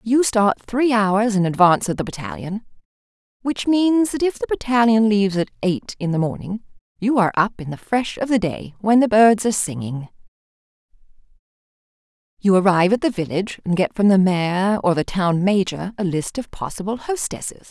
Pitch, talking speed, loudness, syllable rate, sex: 205 Hz, 185 wpm, -19 LUFS, 5.4 syllables/s, female